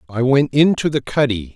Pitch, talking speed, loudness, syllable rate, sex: 135 Hz, 190 wpm, -17 LUFS, 5.1 syllables/s, male